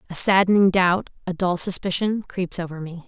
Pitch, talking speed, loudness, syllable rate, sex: 180 Hz, 175 wpm, -20 LUFS, 5.2 syllables/s, female